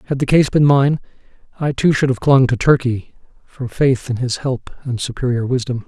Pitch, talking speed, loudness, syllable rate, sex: 130 Hz, 205 wpm, -17 LUFS, 5.1 syllables/s, male